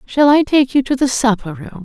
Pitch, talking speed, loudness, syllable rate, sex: 255 Hz, 260 wpm, -14 LUFS, 5.3 syllables/s, female